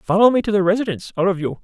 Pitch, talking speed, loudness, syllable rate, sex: 195 Hz, 255 wpm, -18 LUFS, 7.8 syllables/s, male